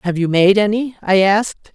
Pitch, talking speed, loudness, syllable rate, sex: 200 Hz, 205 wpm, -15 LUFS, 5.2 syllables/s, female